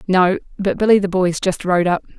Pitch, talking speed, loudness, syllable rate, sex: 185 Hz, 220 wpm, -17 LUFS, 5.3 syllables/s, female